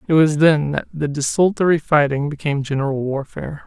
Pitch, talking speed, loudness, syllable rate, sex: 150 Hz, 145 wpm, -18 LUFS, 5.5 syllables/s, male